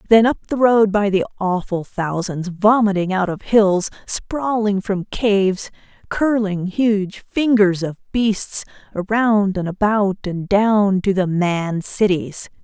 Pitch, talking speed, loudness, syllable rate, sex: 200 Hz, 140 wpm, -18 LUFS, 3.6 syllables/s, female